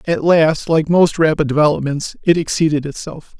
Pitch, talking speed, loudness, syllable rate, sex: 155 Hz, 125 wpm, -15 LUFS, 5.0 syllables/s, male